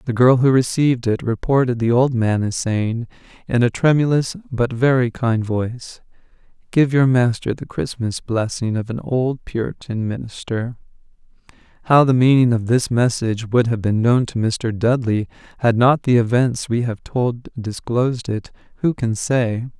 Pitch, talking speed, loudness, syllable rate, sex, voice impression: 120 Hz, 165 wpm, -19 LUFS, 4.6 syllables/s, male, masculine, adult-like, slightly weak, slightly dark, slightly halting, cool, slightly refreshing, friendly, lively, kind, modest